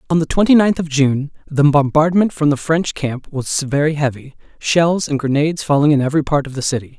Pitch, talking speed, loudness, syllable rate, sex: 150 Hz, 215 wpm, -16 LUFS, 5.6 syllables/s, male